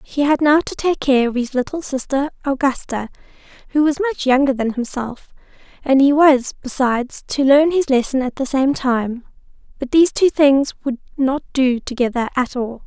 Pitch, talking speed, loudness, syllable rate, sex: 270 Hz, 180 wpm, -17 LUFS, 5.0 syllables/s, female